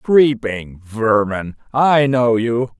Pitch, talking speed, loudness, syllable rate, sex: 120 Hz, 105 wpm, -16 LUFS, 2.7 syllables/s, male